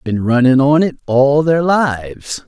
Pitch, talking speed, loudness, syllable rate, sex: 140 Hz, 170 wpm, -13 LUFS, 4.0 syllables/s, male